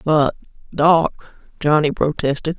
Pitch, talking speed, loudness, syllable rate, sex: 155 Hz, 95 wpm, -18 LUFS, 4.2 syllables/s, female